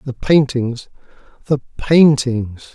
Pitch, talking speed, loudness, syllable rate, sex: 130 Hz, 65 wpm, -16 LUFS, 3.1 syllables/s, male